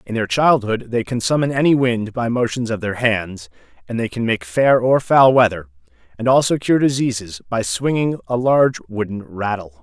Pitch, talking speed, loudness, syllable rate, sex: 115 Hz, 190 wpm, -18 LUFS, 5.0 syllables/s, male